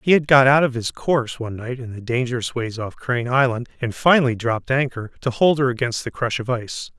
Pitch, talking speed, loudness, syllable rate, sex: 125 Hz, 240 wpm, -20 LUFS, 6.0 syllables/s, male